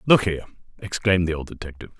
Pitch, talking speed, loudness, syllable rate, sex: 85 Hz, 180 wpm, -23 LUFS, 8.5 syllables/s, male